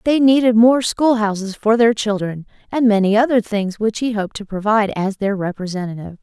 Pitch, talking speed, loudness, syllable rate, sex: 215 Hz, 195 wpm, -17 LUFS, 5.7 syllables/s, female